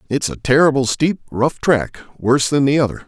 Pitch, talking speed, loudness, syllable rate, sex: 135 Hz, 195 wpm, -17 LUFS, 5.4 syllables/s, male